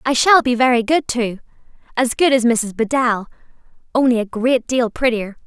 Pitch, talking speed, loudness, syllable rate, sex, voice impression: 240 Hz, 175 wpm, -17 LUFS, 4.9 syllables/s, female, feminine, young, tensed, powerful, bright, clear, fluent, slightly cute, refreshing, friendly, reassuring, lively, slightly kind